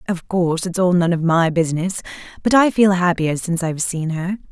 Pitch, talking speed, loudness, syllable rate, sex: 175 Hz, 215 wpm, -18 LUFS, 5.8 syllables/s, female